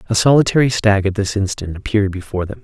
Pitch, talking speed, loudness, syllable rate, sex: 100 Hz, 205 wpm, -17 LUFS, 7.0 syllables/s, male